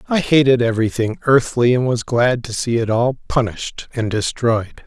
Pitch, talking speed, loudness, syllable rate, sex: 120 Hz, 175 wpm, -18 LUFS, 4.9 syllables/s, male